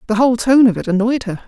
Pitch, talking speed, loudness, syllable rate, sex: 230 Hz, 285 wpm, -15 LUFS, 7.0 syllables/s, female